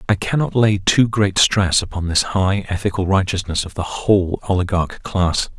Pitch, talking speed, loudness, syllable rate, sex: 95 Hz, 170 wpm, -18 LUFS, 4.8 syllables/s, male